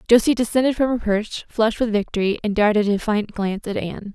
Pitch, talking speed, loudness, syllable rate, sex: 215 Hz, 215 wpm, -20 LUFS, 6.4 syllables/s, female